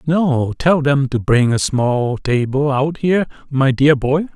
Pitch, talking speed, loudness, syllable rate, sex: 140 Hz, 180 wpm, -16 LUFS, 3.9 syllables/s, male